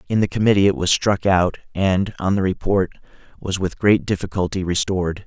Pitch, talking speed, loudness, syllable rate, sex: 95 Hz, 180 wpm, -20 LUFS, 5.4 syllables/s, male